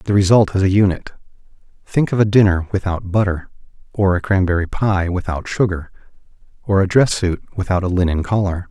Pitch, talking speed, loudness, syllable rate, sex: 95 Hz, 170 wpm, -17 LUFS, 5.6 syllables/s, male